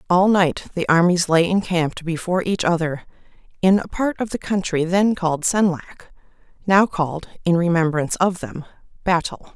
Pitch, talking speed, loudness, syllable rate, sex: 175 Hz, 155 wpm, -20 LUFS, 4.6 syllables/s, female